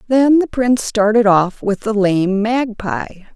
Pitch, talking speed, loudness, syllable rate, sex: 215 Hz, 160 wpm, -15 LUFS, 3.9 syllables/s, female